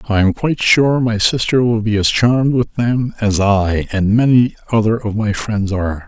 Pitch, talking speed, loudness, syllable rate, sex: 110 Hz, 205 wpm, -15 LUFS, 4.9 syllables/s, male